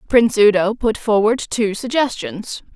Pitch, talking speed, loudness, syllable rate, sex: 215 Hz, 130 wpm, -17 LUFS, 4.5 syllables/s, female